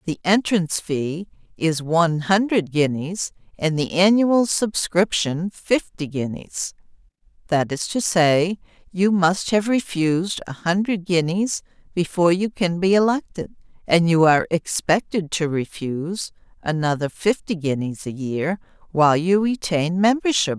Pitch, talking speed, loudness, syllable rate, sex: 175 Hz, 130 wpm, -21 LUFS, 4.3 syllables/s, female